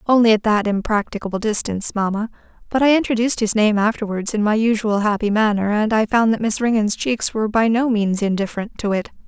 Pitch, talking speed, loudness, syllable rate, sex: 215 Hz, 200 wpm, -18 LUFS, 6.1 syllables/s, female